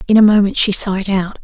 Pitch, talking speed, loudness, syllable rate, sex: 200 Hz, 250 wpm, -14 LUFS, 6.4 syllables/s, female